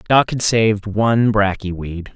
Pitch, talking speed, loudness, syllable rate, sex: 105 Hz, 165 wpm, -17 LUFS, 4.6 syllables/s, male